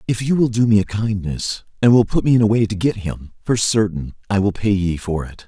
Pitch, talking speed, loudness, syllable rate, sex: 105 Hz, 275 wpm, -18 LUFS, 5.5 syllables/s, male